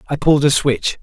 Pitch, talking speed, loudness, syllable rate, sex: 140 Hz, 235 wpm, -15 LUFS, 5.9 syllables/s, male